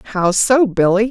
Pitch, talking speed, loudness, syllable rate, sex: 210 Hz, 160 wpm, -14 LUFS, 4.8 syllables/s, female